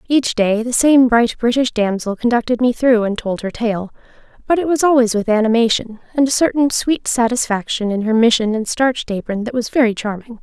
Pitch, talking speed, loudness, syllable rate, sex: 235 Hz, 200 wpm, -16 LUFS, 5.4 syllables/s, female